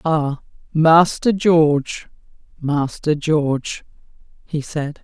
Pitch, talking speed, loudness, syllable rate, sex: 155 Hz, 85 wpm, -18 LUFS, 3.1 syllables/s, female